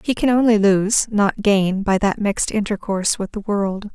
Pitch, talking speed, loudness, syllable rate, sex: 205 Hz, 200 wpm, -18 LUFS, 4.7 syllables/s, female